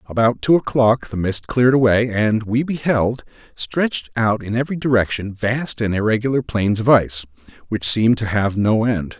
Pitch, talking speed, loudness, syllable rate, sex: 115 Hz, 175 wpm, -18 LUFS, 5.1 syllables/s, male